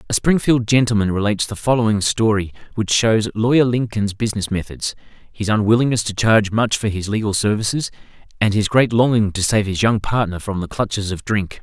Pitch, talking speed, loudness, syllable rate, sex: 110 Hz, 185 wpm, -18 LUFS, 5.7 syllables/s, male